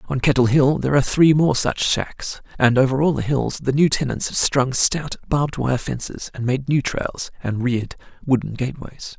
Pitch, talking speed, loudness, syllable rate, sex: 135 Hz, 205 wpm, -20 LUFS, 5.0 syllables/s, male